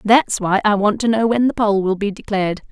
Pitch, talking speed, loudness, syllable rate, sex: 210 Hz, 265 wpm, -17 LUFS, 5.7 syllables/s, female